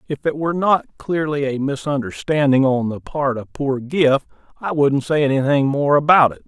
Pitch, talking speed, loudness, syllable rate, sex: 140 Hz, 185 wpm, -18 LUFS, 5.0 syllables/s, male